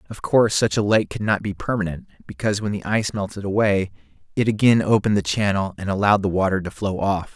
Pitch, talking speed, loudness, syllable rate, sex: 100 Hz, 220 wpm, -21 LUFS, 6.5 syllables/s, male